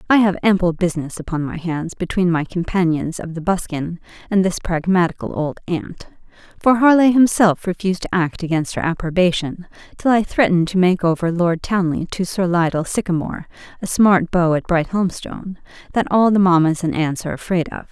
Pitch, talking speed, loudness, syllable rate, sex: 175 Hz, 175 wpm, -18 LUFS, 5.4 syllables/s, female